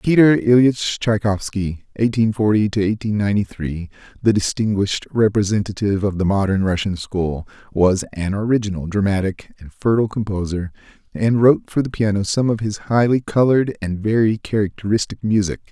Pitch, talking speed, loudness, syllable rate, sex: 105 Hz, 145 wpm, -19 LUFS, 4.9 syllables/s, male